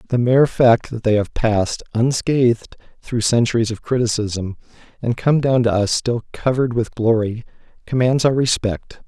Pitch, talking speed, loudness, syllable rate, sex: 115 Hz, 160 wpm, -18 LUFS, 4.9 syllables/s, male